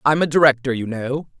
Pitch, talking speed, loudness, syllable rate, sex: 135 Hz, 215 wpm, -18 LUFS, 5.8 syllables/s, female